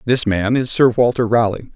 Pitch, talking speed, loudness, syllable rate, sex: 115 Hz, 205 wpm, -16 LUFS, 5.0 syllables/s, male